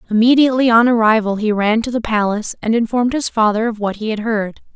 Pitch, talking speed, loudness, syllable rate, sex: 225 Hz, 215 wpm, -16 LUFS, 6.4 syllables/s, female